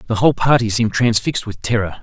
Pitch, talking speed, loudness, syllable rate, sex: 115 Hz, 210 wpm, -17 LUFS, 7.0 syllables/s, male